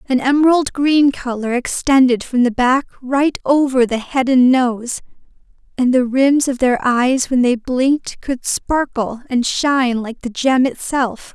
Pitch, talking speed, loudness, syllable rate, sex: 255 Hz, 165 wpm, -16 LUFS, 4.1 syllables/s, female